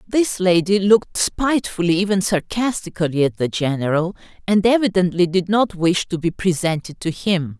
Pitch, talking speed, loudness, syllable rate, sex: 185 Hz, 150 wpm, -19 LUFS, 5.0 syllables/s, female